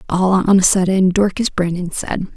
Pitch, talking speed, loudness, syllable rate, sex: 185 Hz, 180 wpm, -16 LUFS, 4.6 syllables/s, female